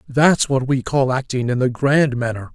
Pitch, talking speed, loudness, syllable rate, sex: 130 Hz, 210 wpm, -18 LUFS, 4.7 syllables/s, male